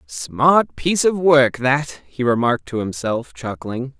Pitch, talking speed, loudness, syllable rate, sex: 130 Hz, 150 wpm, -18 LUFS, 4.0 syllables/s, male